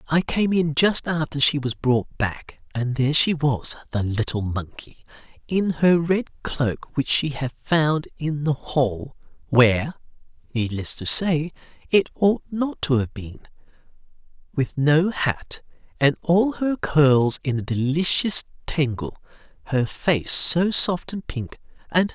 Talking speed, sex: 155 wpm, male